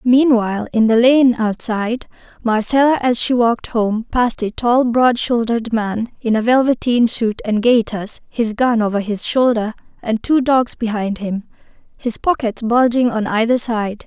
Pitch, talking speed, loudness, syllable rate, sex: 230 Hz, 160 wpm, -16 LUFS, 4.5 syllables/s, female